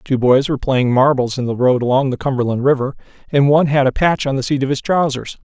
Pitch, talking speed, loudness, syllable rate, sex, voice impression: 135 Hz, 250 wpm, -16 LUFS, 6.2 syllables/s, male, masculine, adult-like, tensed, powerful, slightly bright, slightly muffled, raspy, friendly, unique, wild, slightly intense